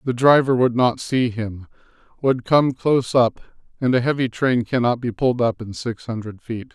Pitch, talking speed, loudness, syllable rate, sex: 120 Hz, 185 wpm, -20 LUFS, 5.0 syllables/s, male